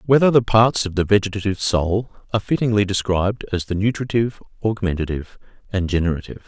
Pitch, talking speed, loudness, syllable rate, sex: 100 Hz, 150 wpm, -20 LUFS, 6.7 syllables/s, male